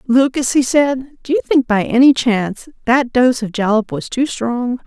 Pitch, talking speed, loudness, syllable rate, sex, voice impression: 250 Hz, 195 wpm, -16 LUFS, 4.6 syllables/s, female, feminine, adult-like, calm, elegant, slightly kind